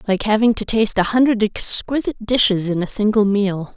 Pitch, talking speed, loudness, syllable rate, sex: 215 Hz, 190 wpm, -17 LUFS, 5.6 syllables/s, female